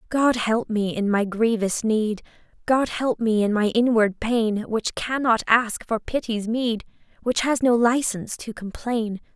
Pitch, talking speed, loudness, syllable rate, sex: 225 Hz, 165 wpm, -22 LUFS, 4.1 syllables/s, female